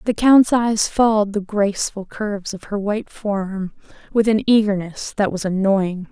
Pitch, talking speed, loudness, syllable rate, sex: 205 Hz, 165 wpm, -19 LUFS, 4.9 syllables/s, female